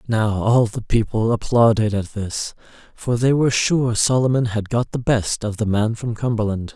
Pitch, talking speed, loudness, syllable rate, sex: 115 Hz, 185 wpm, -19 LUFS, 4.7 syllables/s, male